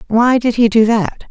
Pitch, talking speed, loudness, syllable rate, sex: 225 Hz, 230 wpm, -13 LUFS, 4.6 syllables/s, female